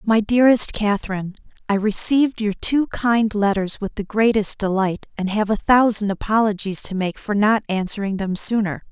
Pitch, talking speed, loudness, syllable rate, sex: 210 Hz, 170 wpm, -19 LUFS, 5.1 syllables/s, female